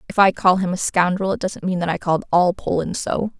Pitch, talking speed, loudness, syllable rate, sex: 185 Hz, 265 wpm, -19 LUFS, 5.8 syllables/s, female